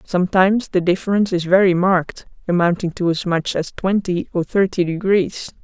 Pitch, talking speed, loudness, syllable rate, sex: 185 Hz, 160 wpm, -18 LUFS, 5.4 syllables/s, female